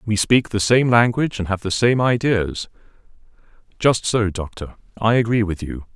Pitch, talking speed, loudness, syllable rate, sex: 110 Hz, 170 wpm, -19 LUFS, 4.9 syllables/s, male